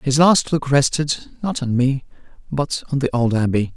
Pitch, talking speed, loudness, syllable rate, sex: 135 Hz, 160 wpm, -19 LUFS, 4.7 syllables/s, male